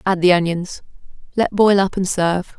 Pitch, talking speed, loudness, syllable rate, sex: 185 Hz, 185 wpm, -17 LUFS, 5.2 syllables/s, female